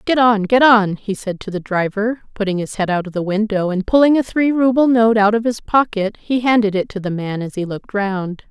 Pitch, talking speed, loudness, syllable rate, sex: 210 Hz, 255 wpm, -17 LUFS, 5.4 syllables/s, female